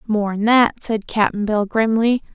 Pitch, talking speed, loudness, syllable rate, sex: 220 Hz, 155 wpm, -18 LUFS, 3.9 syllables/s, female